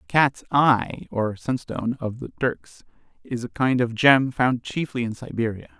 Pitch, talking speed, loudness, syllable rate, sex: 120 Hz, 175 wpm, -23 LUFS, 4.4 syllables/s, male